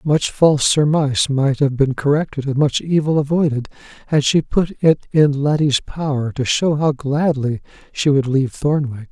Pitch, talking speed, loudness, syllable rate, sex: 145 Hz, 170 wpm, -17 LUFS, 4.8 syllables/s, male